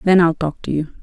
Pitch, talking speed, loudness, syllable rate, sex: 165 Hz, 290 wpm, -18 LUFS, 6.3 syllables/s, female